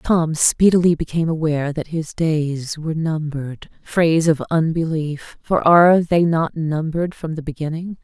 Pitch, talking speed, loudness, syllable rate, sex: 160 Hz, 140 wpm, -19 LUFS, 4.8 syllables/s, female